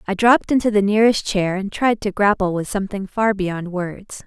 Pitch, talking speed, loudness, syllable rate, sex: 200 Hz, 210 wpm, -19 LUFS, 5.4 syllables/s, female